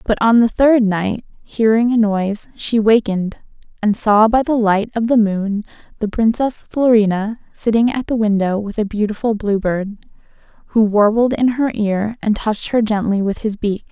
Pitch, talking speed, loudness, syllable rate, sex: 215 Hz, 180 wpm, -16 LUFS, 4.8 syllables/s, female